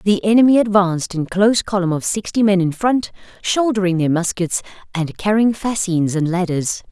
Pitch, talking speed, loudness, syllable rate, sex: 195 Hz, 165 wpm, -17 LUFS, 5.4 syllables/s, female